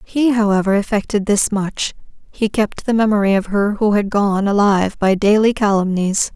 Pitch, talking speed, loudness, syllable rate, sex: 205 Hz, 170 wpm, -16 LUFS, 4.9 syllables/s, female